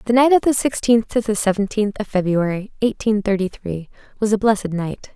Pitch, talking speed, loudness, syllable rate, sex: 210 Hz, 200 wpm, -19 LUFS, 5.5 syllables/s, female